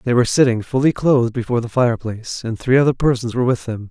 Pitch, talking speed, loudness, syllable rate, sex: 120 Hz, 230 wpm, -18 LUFS, 7.2 syllables/s, male